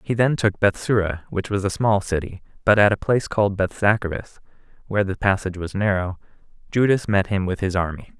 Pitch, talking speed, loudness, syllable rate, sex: 100 Hz, 190 wpm, -21 LUFS, 5.9 syllables/s, male